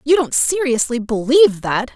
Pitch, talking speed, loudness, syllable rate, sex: 260 Hz, 155 wpm, -16 LUFS, 4.9 syllables/s, female